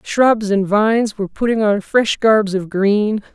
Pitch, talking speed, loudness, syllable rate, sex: 210 Hz, 180 wpm, -16 LUFS, 4.1 syllables/s, female